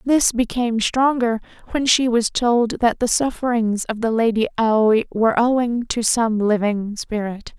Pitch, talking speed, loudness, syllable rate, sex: 230 Hz, 160 wpm, -19 LUFS, 4.4 syllables/s, female